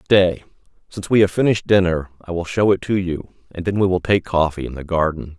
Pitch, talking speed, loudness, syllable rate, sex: 90 Hz, 235 wpm, -19 LUFS, 5.9 syllables/s, male